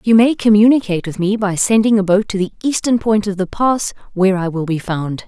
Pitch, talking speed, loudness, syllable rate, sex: 205 Hz, 240 wpm, -15 LUFS, 5.8 syllables/s, female